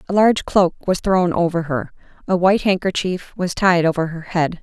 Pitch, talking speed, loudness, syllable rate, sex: 175 Hz, 195 wpm, -18 LUFS, 5.3 syllables/s, female